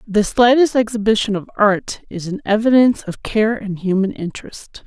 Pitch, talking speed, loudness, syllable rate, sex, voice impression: 215 Hz, 160 wpm, -17 LUFS, 5.0 syllables/s, female, feminine, adult-like, relaxed, bright, soft, slightly muffled, slightly raspy, intellectual, friendly, reassuring, kind